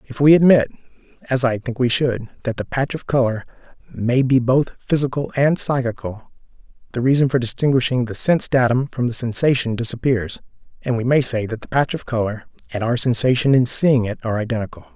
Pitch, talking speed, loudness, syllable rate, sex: 125 Hz, 180 wpm, -19 LUFS, 5.8 syllables/s, male